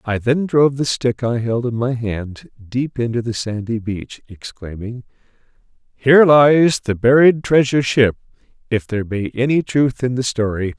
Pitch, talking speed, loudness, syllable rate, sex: 120 Hz, 165 wpm, -17 LUFS, 4.6 syllables/s, male